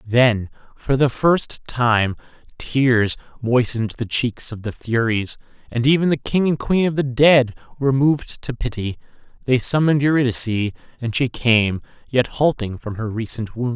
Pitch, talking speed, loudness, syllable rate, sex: 125 Hz, 160 wpm, -19 LUFS, 4.6 syllables/s, male